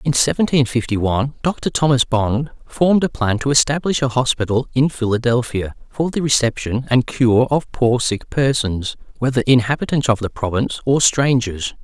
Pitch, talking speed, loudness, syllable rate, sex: 125 Hz, 160 wpm, -18 LUFS, 5.0 syllables/s, male